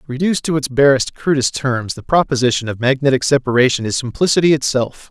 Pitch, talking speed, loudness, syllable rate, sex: 135 Hz, 165 wpm, -16 LUFS, 6.0 syllables/s, male